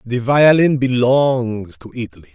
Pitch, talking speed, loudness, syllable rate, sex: 120 Hz, 130 wpm, -14 LUFS, 4.1 syllables/s, male